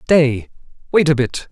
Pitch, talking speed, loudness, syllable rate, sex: 145 Hz, 160 wpm, -16 LUFS, 3.8 syllables/s, male